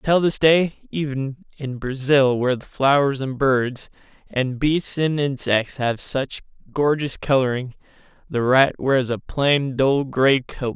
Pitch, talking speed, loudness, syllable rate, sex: 135 Hz, 150 wpm, -20 LUFS, 4.0 syllables/s, male